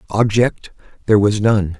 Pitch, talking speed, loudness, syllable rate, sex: 105 Hz, 135 wpm, -16 LUFS, 4.8 syllables/s, male